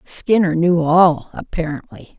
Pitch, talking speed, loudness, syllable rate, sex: 165 Hz, 110 wpm, -16 LUFS, 3.9 syllables/s, female